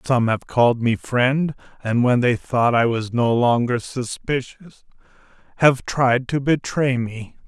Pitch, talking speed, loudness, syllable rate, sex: 125 Hz, 155 wpm, -20 LUFS, 4.0 syllables/s, male